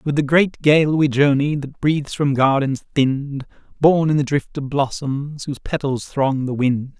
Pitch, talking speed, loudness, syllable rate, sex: 140 Hz, 190 wpm, -19 LUFS, 4.7 syllables/s, male